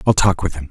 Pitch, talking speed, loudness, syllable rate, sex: 85 Hz, 340 wpm, -18 LUFS, 7.0 syllables/s, male